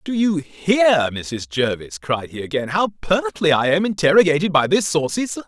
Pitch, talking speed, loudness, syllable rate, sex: 165 Hz, 185 wpm, -19 LUFS, 4.8 syllables/s, male